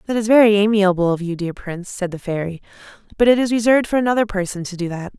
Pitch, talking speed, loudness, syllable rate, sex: 200 Hz, 245 wpm, -18 LUFS, 7.0 syllables/s, female